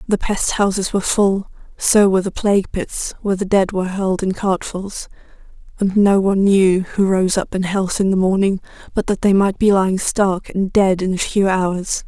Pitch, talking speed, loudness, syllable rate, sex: 195 Hz, 210 wpm, -17 LUFS, 5.0 syllables/s, female